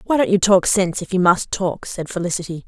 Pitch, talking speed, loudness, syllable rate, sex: 185 Hz, 245 wpm, -18 LUFS, 5.8 syllables/s, female